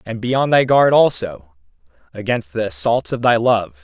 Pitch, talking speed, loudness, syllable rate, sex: 110 Hz, 190 wpm, -16 LUFS, 4.8 syllables/s, male